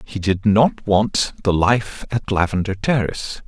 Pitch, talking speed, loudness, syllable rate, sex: 100 Hz, 155 wpm, -19 LUFS, 4.1 syllables/s, male